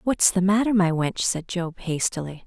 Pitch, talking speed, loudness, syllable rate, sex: 185 Hz, 195 wpm, -23 LUFS, 4.7 syllables/s, female